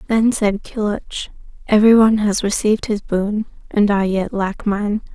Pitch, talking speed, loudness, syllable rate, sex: 210 Hz, 165 wpm, -18 LUFS, 4.7 syllables/s, female